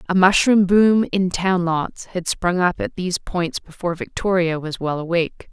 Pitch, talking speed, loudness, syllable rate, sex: 180 Hz, 185 wpm, -19 LUFS, 4.8 syllables/s, female